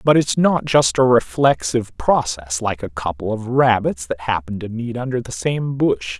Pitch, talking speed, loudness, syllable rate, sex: 110 Hz, 195 wpm, -19 LUFS, 4.6 syllables/s, male